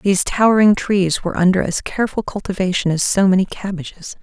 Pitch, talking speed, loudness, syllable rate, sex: 190 Hz, 170 wpm, -17 LUFS, 6.0 syllables/s, female